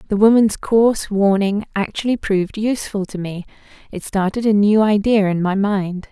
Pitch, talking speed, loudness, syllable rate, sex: 205 Hz, 165 wpm, -17 LUFS, 5.1 syllables/s, female